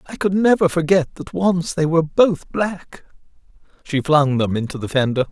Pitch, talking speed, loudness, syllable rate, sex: 165 Hz, 180 wpm, -18 LUFS, 4.8 syllables/s, male